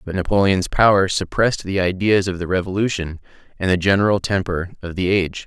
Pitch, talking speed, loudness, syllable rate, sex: 95 Hz, 175 wpm, -19 LUFS, 6.0 syllables/s, male